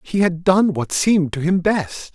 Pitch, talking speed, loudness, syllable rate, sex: 175 Hz, 225 wpm, -18 LUFS, 4.4 syllables/s, male